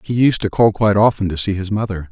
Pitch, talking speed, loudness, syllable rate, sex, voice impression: 100 Hz, 285 wpm, -16 LUFS, 6.5 syllables/s, male, very masculine, slightly middle-aged, thick, cool, calm, slightly elegant, slightly sweet